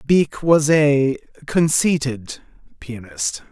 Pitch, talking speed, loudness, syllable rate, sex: 140 Hz, 85 wpm, -18 LUFS, 3.8 syllables/s, male